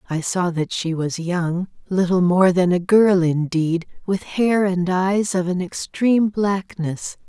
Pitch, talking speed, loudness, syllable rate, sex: 180 Hz, 165 wpm, -20 LUFS, 3.8 syllables/s, female